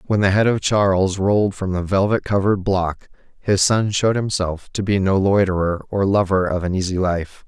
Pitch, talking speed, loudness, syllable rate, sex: 95 Hz, 200 wpm, -19 LUFS, 5.2 syllables/s, male